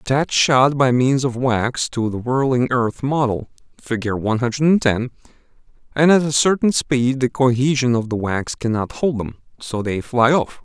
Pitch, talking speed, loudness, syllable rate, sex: 125 Hz, 180 wpm, -18 LUFS, 4.5 syllables/s, male